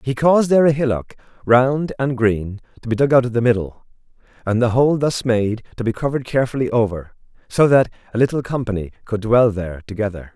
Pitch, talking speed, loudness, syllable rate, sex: 120 Hz, 195 wpm, -18 LUFS, 6.0 syllables/s, male